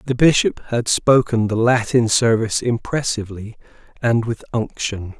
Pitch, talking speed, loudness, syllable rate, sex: 115 Hz, 125 wpm, -18 LUFS, 4.7 syllables/s, male